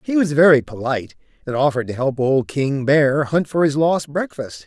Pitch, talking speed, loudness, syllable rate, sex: 140 Hz, 205 wpm, -18 LUFS, 5.2 syllables/s, male